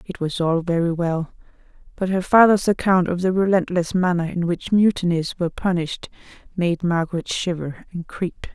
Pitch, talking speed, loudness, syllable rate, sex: 175 Hz, 160 wpm, -21 LUFS, 5.1 syllables/s, female